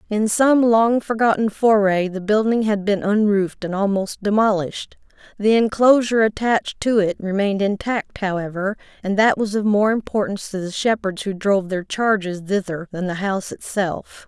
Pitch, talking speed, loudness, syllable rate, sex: 205 Hz, 165 wpm, -19 LUFS, 5.1 syllables/s, female